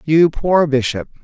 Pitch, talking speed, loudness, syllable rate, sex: 150 Hz, 145 wpm, -16 LUFS, 4.0 syllables/s, male